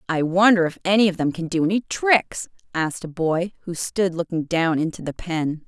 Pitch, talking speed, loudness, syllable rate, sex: 175 Hz, 210 wpm, -21 LUFS, 5.1 syllables/s, female